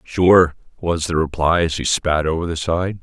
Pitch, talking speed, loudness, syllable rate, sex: 85 Hz, 200 wpm, -18 LUFS, 4.4 syllables/s, male